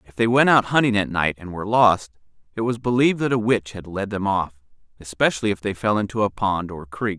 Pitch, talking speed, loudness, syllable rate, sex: 105 Hz, 240 wpm, -21 LUFS, 5.9 syllables/s, male